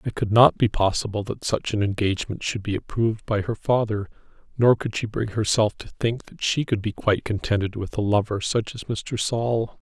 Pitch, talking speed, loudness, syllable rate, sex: 110 Hz, 215 wpm, -23 LUFS, 5.3 syllables/s, male